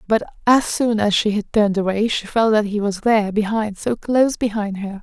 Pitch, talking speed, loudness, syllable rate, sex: 210 Hz, 225 wpm, -19 LUFS, 5.3 syllables/s, female